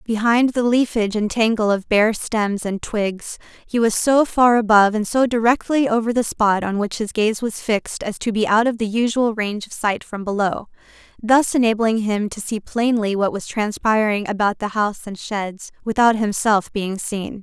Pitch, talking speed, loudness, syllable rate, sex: 220 Hz, 195 wpm, -19 LUFS, 4.8 syllables/s, female